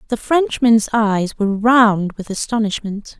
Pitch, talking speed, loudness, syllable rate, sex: 220 Hz, 130 wpm, -16 LUFS, 4.1 syllables/s, female